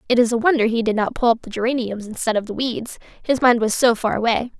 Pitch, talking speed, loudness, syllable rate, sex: 230 Hz, 250 wpm, -19 LUFS, 5.9 syllables/s, female